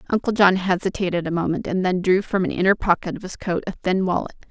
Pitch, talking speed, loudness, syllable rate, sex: 185 Hz, 240 wpm, -21 LUFS, 6.5 syllables/s, female